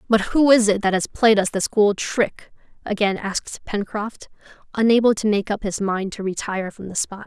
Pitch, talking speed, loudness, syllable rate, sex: 210 Hz, 205 wpm, -20 LUFS, 5.1 syllables/s, female